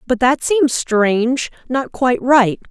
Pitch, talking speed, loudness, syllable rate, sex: 255 Hz, 135 wpm, -16 LUFS, 3.9 syllables/s, female